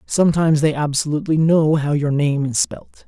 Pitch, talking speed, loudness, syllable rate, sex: 150 Hz, 175 wpm, -18 LUFS, 5.5 syllables/s, male